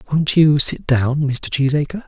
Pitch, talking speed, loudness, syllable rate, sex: 145 Hz, 175 wpm, -17 LUFS, 4.4 syllables/s, male